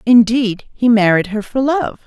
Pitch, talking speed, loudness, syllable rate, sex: 230 Hz, 175 wpm, -15 LUFS, 4.3 syllables/s, female